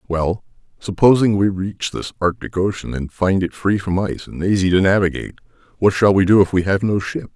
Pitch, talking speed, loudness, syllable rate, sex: 95 Hz, 210 wpm, -18 LUFS, 5.6 syllables/s, male